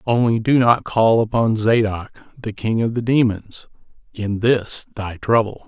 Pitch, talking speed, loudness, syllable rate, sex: 110 Hz, 160 wpm, -18 LUFS, 4.2 syllables/s, male